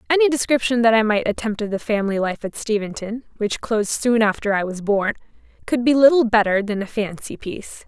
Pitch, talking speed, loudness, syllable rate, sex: 220 Hz, 205 wpm, -20 LUFS, 5.9 syllables/s, female